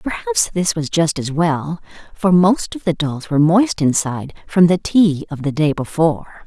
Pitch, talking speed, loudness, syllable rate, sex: 165 Hz, 195 wpm, -17 LUFS, 4.6 syllables/s, female